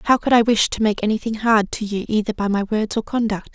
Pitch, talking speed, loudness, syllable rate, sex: 215 Hz, 270 wpm, -19 LUFS, 6.0 syllables/s, female